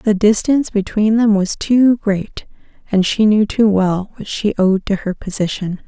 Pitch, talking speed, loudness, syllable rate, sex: 205 Hz, 185 wpm, -16 LUFS, 4.4 syllables/s, female